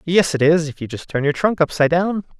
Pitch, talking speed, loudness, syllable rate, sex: 160 Hz, 275 wpm, -18 LUFS, 6.0 syllables/s, male